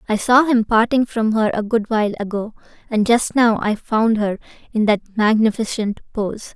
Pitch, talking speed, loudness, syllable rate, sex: 220 Hz, 185 wpm, -18 LUFS, 4.9 syllables/s, female